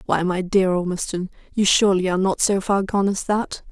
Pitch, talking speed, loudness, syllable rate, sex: 190 Hz, 210 wpm, -20 LUFS, 5.5 syllables/s, female